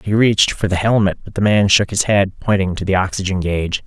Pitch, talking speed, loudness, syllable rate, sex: 95 Hz, 250 wpm, -16 LUFS, 6.1 syllables/s, male